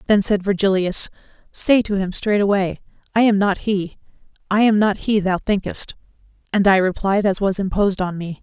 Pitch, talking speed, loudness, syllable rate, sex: 200 Hz, 180 wpm, -19 LUFS, 5.0 syllables/s, female